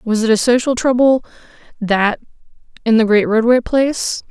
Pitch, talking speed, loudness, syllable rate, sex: 235 Hz, 125 wpm, -15 LUFS, 5.0 syllables/s, female